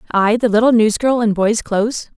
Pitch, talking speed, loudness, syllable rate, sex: 220 Hz, 190 wpm, -15 LUFS, 5.2 syllables/s, female